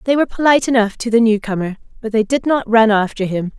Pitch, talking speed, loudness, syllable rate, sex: 225 Hz, 235 wpm, -16 LUFS, 6.5 syllables/s, female